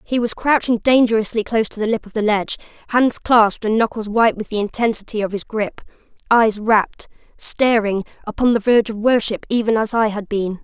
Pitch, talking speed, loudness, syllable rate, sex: 220 Hz, 190 wpm, -18 LUFS, 5.6 syllables/s, female